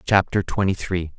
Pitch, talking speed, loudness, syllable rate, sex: 95 Hz, 150 wpm, -22 LUFS, 4.9 syllables/s, male